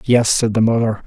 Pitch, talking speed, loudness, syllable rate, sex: 110 Hz, 225 wpm, -16 LUFS, 5.2 syllables/s, male